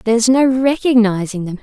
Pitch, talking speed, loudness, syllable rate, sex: 235 Hz, 150 wpm, -14 LUFS, 5.4 syllables/s, female